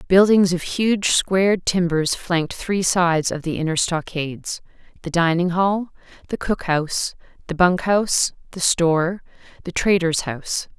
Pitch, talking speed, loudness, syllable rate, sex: 175 Hz, 140 wpm, -20 LUFS, 4.6 syllables/s, female